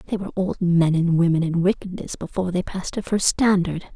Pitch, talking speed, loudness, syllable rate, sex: 180 Hz, 210 wpm, -22 LUFS, 6.1 syllables/s, female